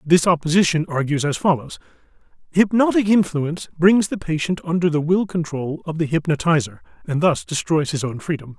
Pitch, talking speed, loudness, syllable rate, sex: 165 Hz, 160 wpm, -20 LUFS, 5.4 syllables/s, male